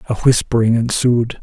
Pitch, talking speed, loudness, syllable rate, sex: 120 Hz, 125 wpm, -15 LUFS, 4.8 syllables/s, male